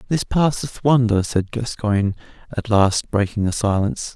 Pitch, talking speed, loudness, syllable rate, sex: 110 Hz, 145 wpm, -20 LUFS, 4.7 syllables/s, male